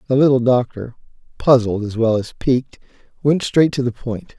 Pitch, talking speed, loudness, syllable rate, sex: 125 Hz, 180 wpm, -18 LUFS, 5.1 syllables/s, male